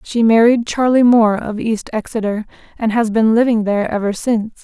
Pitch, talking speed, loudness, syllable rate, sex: 225 Hz, 180 wpm, -15 LUFS, 5.5 syllables/s, female